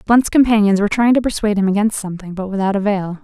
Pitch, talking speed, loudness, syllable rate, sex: 205 Hz, 225 wpm, -16 LUFS, 7.1 syllables/s, female